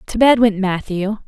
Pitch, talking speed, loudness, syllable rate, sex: 210 Hz, 190 wpm, -16 LUFS, 4.4 syllables/s, female